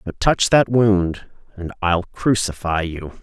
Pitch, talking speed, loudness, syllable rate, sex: 95 Hz, 150 wpm, -19 LUFS, 3.7 syllables/s, male